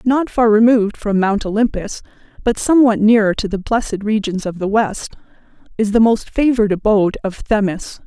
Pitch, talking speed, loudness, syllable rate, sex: 215 Hz, 170 wpm, -16 LUFS, 5.4 syllables/s, female